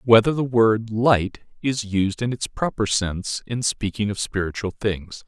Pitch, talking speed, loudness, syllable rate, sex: 110 Hz, 170 wpm, -22 LUFS, 4.2 syllables/s, male